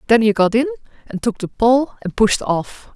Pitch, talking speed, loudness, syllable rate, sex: 230 Hz, 225 wpm, -17 LUFS, 4.9 syllables/s, female